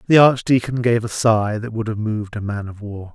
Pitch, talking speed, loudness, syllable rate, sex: 110 Hz, 250 wpm, -19 LUFS, 5.4 syllables/s, male